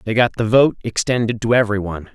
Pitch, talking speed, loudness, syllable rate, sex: 115 Hz, 195 wpm, -17 LUFS, 6.4 syllables/s, male